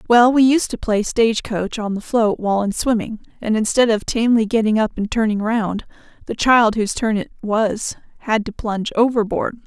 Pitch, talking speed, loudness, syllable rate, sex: 220 Hz, 200 wpm, -18 LUFS, 5.3 syllables/s, female